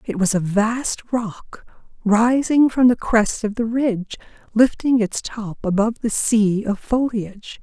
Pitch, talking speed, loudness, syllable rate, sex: 220 Hz, 155 wpm, -19 LUFS, 4.0 syllables/s, female